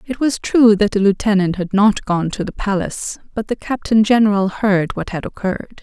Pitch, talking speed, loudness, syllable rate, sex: 205 Hz, 205 wpm, -17 LUFS, 5.2 syllables/s, female